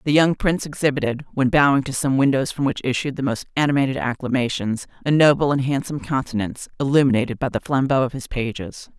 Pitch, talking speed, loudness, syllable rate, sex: 135 Hz, 185 wpm, -21 LUFS, 6.4 syllables/s, female